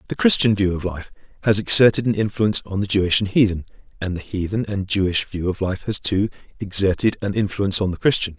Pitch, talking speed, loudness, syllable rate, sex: 100 Hz, 215 wpm, -20 LUFS, 6.1 syllables/s, male